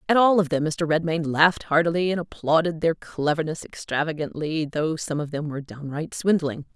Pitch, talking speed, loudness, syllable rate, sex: 160 Hz, 180 wpm, -24 LUFS, 5.4 syllables/s, female